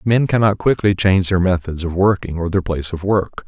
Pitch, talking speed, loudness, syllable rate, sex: 95 Hz, 225 wpm, -17 LUFS, 5.9 syllables/s, male